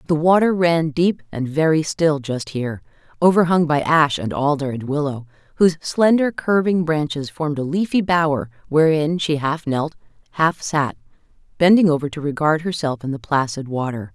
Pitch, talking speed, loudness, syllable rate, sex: 155 Hz, 165 wpm, -19 LUFS, 5.0 syllables/s, female